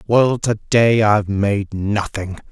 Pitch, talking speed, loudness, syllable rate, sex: 105 Hz, 145 wpm, -17 LUFS, 3.5 syllables/s, male